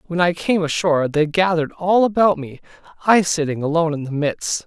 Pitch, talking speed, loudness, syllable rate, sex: 165 Hz, 195 wpm, -18 LUFS, 5.7 syllables/s, male